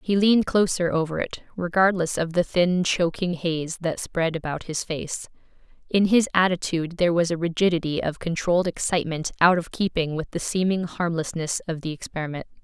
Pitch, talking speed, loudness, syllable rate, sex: 170 Hz, 170 wpm, -24 LUFS, 5.4 syllables/s, female